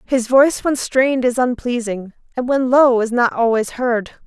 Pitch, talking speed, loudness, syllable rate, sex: 245 Hz, 185 wpm, -17 LUFS, 4.7 syllables/s, female